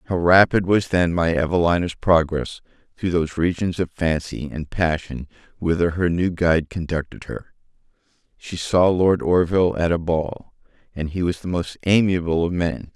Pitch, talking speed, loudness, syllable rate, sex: 85 Hz, 155 wpm, -21 LUFS, 4.8 syllables/s, male